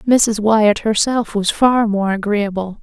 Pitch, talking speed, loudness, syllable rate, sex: 215 Hz, 150 wpm, -16 LUFS, 3.6 syllables/s, female